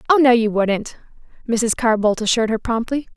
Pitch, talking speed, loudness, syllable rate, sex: 230 Hz, 190 wpm, -18 LUFS, 5.6 syllables/s, female